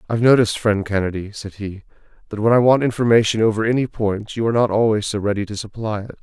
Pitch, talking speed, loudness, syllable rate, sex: 110 Hz, 230 wpm, -18 LUFS, 6.7 syllables/s, male